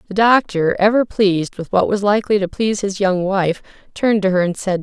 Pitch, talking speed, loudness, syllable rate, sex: 195 Hz, 225 wpm, -17 LUFS, 5.8 syllables/s, female